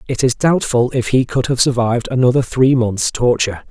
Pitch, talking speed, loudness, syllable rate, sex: 125 Hz, 195 wpm, -15 LUFS, 5.5 syllables/s, male